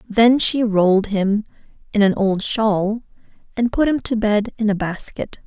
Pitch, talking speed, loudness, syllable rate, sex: 215 Hz, 175 wpm, -18 LUFS, 4.3 syllables/s, female